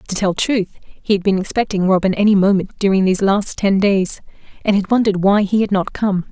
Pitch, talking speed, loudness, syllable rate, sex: 195 Hz, 220 wpm, -16 LUFS, 5.9 syllables/s, female